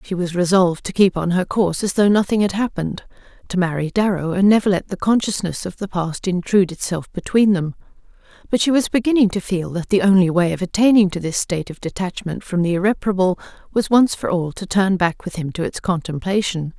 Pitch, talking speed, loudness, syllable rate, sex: 190 Hz, 215 wpm, -19 LUFS, 5.9 syllables/s, female